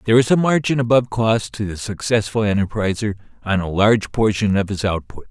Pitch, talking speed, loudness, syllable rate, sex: 105 Hz, 190 wpm, -19 LUFS, 6.0 syllables/s, male